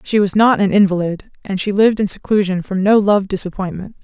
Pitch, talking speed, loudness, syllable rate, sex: 195 Hz, 210 wpm, -16 LUFS, 5.8 syllables/s, female